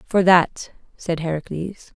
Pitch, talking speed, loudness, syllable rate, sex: 170 Hz, 120 wpm, -20 LUFS, 3.8 syllables/s, female